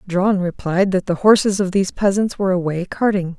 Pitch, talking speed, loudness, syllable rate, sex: 190 Hz, 195 wpm, -18 LUFS, 5.6 syllables/s, female